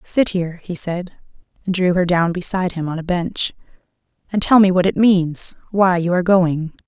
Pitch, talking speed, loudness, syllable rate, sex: 180 Hz, 200 wpm, -18 LUFS, 5.2 syllables/s, female